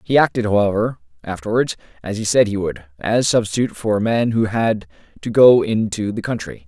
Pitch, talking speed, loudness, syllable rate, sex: 105 Hz, 190 wpm, -18 LUFS, 5.5 syllables/s, male